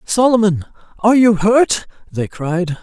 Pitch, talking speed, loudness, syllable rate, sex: 190 Hz, 125 wpm, -15 LUFS, 4.2 syllables/s, male